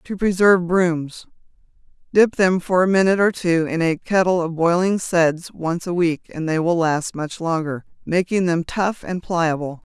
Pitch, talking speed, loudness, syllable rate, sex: 175 Hz, 175 wpm, -19 LUFS, 4.5 syllables/s, female